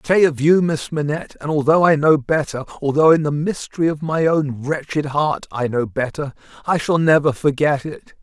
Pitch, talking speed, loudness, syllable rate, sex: 150 Hz, 180 wpm, -18 LUFS, 5.1 syllables/s, male